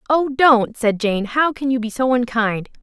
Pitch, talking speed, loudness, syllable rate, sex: 245 Hz, 210 wpm, -18 LUFS, 4.4 syllables/s, female